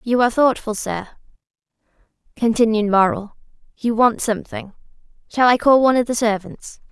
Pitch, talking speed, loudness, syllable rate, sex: 230 Hz, 140 wpm, -18 LUFS, 5.4 syllables/s, female